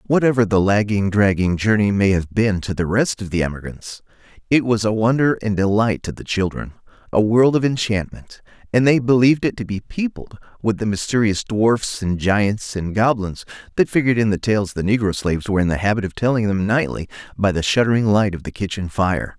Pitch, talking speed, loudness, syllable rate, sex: 105 Hz, 205 wpm, -19 LUFS, 5.5 syllables/s, male